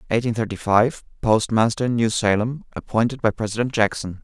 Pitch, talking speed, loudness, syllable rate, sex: 115 Hz, 130 wpm, -21 LUFS, 6.9 syllables/s, male